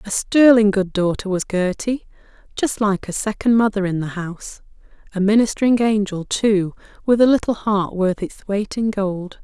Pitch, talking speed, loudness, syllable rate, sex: 205 Hz, 170 wpm, -19 LUFS, 4.8 syllables/s, female